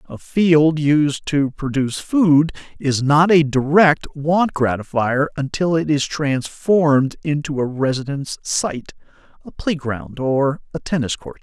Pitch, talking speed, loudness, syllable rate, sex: 145 Hz, 135 wpm, -18 LUFS, 4.0 syllables/s, male